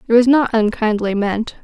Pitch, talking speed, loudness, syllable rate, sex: 225 Hz, 185 wpm, -16 LUFS, 5.1 syllables/s, female